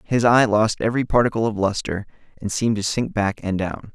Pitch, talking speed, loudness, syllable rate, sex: 110 Hz, 215 wpm, -21 LUFS, 5.7 syllables/s, male